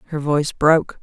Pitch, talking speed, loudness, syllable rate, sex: 150 Hz, 175 wpm, -18 LUFS, 6.4 syllables/s, female